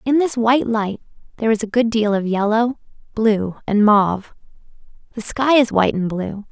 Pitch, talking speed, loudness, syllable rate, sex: 220 Hz, 185 wpm, -18 LUFS, 5.2 syllables/s, female